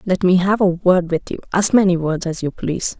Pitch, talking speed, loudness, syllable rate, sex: 180 Hz, 240 wpm, -17 LUFS, 5.6 syllables/s, female